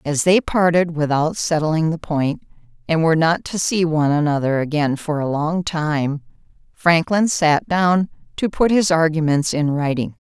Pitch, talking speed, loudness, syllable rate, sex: 160 Hz, 165 wpm, -18 LUFS, 4.5 syllables/s, female